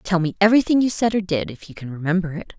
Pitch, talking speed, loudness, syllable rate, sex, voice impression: 185 Hz, 280 wpm, -20 LUFS, 6.9 syllables/s, female, very feminine, very adult-like, slightly old, slightly thin, slightly tensed, slightly weak, slightly bright, hard, very clear, very fluent, slightly raspy, slightly cool, intellectual, very refreshing, very sincere, calm, friendly, reassuring, unique, very elegant, wild, slightly sweet, lively, kind